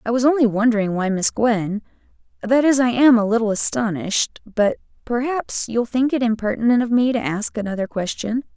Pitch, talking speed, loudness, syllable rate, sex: 230 Hz, 160 wpm, -19 LUFS, 5.4 syllables/s, female